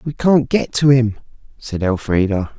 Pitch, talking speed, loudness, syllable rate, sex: 120 Hz, 165 wpm, -16 LUFS, 4.3 syllables/s, male